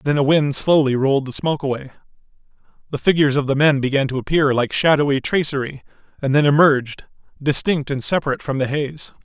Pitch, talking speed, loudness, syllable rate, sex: 140 Hz, 180 wpm, -18 LUFS, 6.3 syllables/s, male